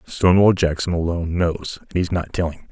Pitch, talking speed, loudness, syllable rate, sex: 85 Hz, 175 wpm, -20 LUFS, 5.7 syllables/s, male